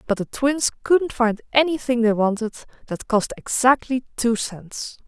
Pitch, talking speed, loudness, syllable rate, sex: 240 Hz, 155 wpm, -21 LUFS, 4.4 syllables/s, female